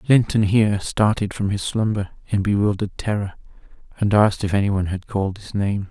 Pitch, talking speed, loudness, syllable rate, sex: 100 Hz, 185 wpm, -21 LUFS, 6.1 syllables/s, male